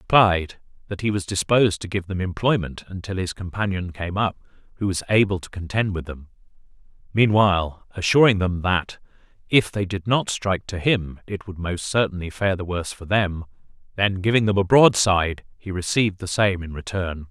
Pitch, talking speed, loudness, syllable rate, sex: 95 Hz, 185 wpm, -22 LUFS, 5.4 syllables/s, male